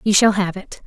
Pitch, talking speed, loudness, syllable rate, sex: 195 Hz, 275 wpm, -17 LUFS, 5.3 syllables/s, female